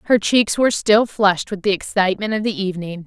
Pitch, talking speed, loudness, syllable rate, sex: 200 Hz, 215 wpm, -18 LUFS, 6.2 syllables/s, female